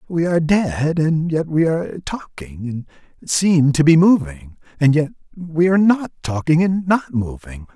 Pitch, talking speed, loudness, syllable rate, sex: 155 Hz, 165 wpm, -17 LUFS, 4.3 syllables/s, male